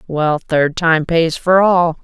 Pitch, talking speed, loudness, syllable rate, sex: 165 Hz, 175 wpm, -14 LUFS, 3.4 syllables/s, female